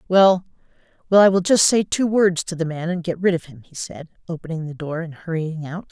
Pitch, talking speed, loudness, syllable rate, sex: 170 Hz, 245 wpm, -20 LUFS, 5.6 syllables/s, female